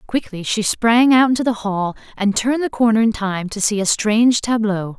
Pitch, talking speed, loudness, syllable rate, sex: 220 Hz, 215 wpm, -17 LUFS, 5.2 syllables/s, female